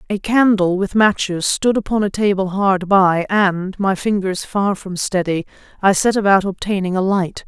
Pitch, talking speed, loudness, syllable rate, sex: 195 Hz, 175 wpm, -17 LUFS, 4.5 syllables/s, female